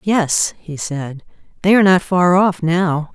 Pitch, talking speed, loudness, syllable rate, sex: 175 Hz, 170 wpm, -16 LUFS, 3.9 syllables/s, female